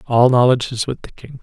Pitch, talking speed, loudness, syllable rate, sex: 125 Hz, 255 wpm, -16 LUFS, 6.2 syllables/s, male